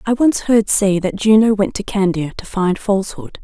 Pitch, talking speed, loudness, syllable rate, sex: 205 Hz, 210 wpm, -16 LUFS, 4.9 syllables/s, female